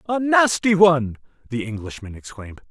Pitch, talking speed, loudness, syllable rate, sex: 150 Hz, 135 wpm, -18 LUFS, 5.6 syllables/s, male